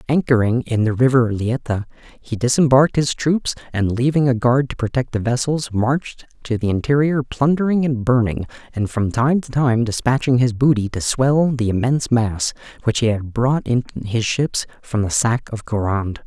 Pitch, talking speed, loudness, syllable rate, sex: 125 Hz, 180 wpm, -19 LUFS, 5.0 syllables/s, male